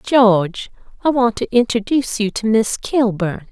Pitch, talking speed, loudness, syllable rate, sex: 225 Hz, 155 wpm, -17 LUFS, 4.6 syllables/s, female